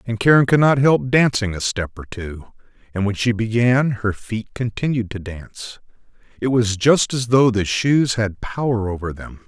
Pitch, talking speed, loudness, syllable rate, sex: 115 Hz, 190 wpm, -19 LUFS, 4.6 syllables/s, male